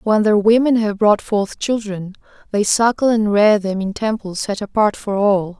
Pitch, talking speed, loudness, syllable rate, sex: 210 Hz, 195 wpm, -17 LUFS, 4.4 syllables/s, female